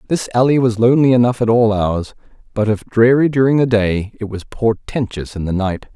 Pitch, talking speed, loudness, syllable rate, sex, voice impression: 115 Hz, 200 wpm, -16 LUFS, 5.4 syllables/s, male, masculine, adult-like, slightly thick, cool, slightly intellectual, slightly calm